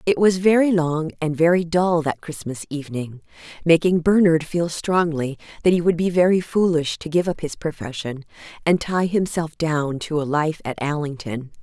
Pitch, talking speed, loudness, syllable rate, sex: 160 Hz, 175 wpm, -21 LUFS, 4.8 syllables/s, female